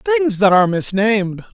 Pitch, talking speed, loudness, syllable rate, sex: 215 Hz, 150 wpm, -15 LUFS, 6.4 syllables/s, male